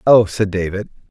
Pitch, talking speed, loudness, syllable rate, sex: 105 Hz, 165 wpm, -17 LUFS, 5.1 syllables/s, male